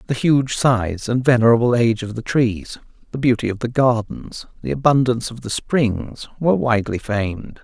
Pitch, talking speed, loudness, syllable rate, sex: 120 Hz, 175 wpm, -19 LUFS, 5.1 syllables/s, male